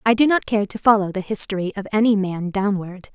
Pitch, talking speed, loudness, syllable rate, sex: 205 Hz, 230 wpm, -20 LUFS, 5.7 syllables/s, female